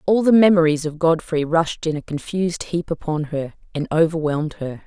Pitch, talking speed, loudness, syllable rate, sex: 160 Hz, 185 wpm, -20 LUFS, 5.3 syllables/s, female